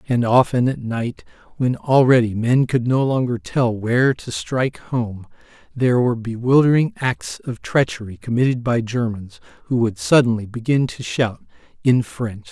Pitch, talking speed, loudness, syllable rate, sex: 120 Hz, 155 wpm, -19 LUFS, 4.8 syllables/s, male